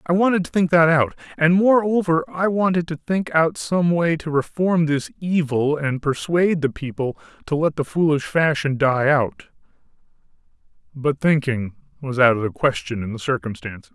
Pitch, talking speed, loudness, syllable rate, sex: 150 Hz, 170 wpm, -20 LUFS, 4.9 syllables/s, male